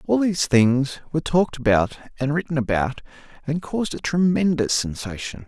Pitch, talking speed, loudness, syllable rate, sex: 145 Hz, 155 wpm, -22 LUFS, 5.5 syllables/s, male